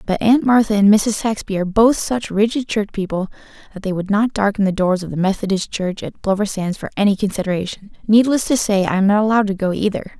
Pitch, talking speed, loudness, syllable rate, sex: 205 Hz, 230 wpm, -18 LUFS, 6.1 syllables/s, female